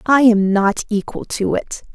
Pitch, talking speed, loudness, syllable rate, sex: 215 Hz, 185 wpm, -17 LUFS, 4.1 syllables/s, female